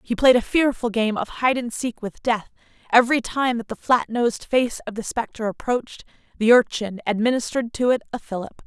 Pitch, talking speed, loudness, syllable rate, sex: 230 Hz, 200 wpm, -22 LUFS, 5.6 syllables/s, female